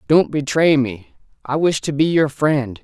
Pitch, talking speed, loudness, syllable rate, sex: 145 Hz, 190 wpm, -18 LUFS, 4.2 syllables/s, male